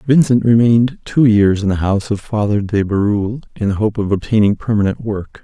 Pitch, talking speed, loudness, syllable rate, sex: 105 Hz, 200 wpm, -15 LUFS, 5.6 syllables/s, male